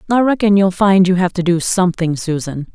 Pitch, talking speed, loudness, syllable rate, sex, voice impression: 185 Hz, 220 wpm, -14 LUFS, 5.6 syllables/s, female, feminine, adult-like, slightly clear, slightly intellectual, slightly elegant